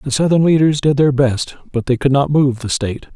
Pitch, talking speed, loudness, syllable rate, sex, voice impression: 135 Hz, 245 wpm, -15 LUFS, 5.6 syllables/s, male, very masculine, very adult-like, slightly old, very thick, slightly relaxed, very powerful, slightly dark, muffled, fluent, slightly raspy, cool, very intellectual, sincere, very calm, friendly, very reassuring, unique, slightly elegant, wild, sweet, kind, slightly modest